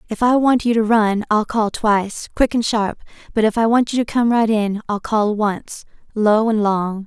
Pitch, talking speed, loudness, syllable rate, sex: 220 Hz, 230 wpm, -18 LUFS, 4.6 syllables/s, female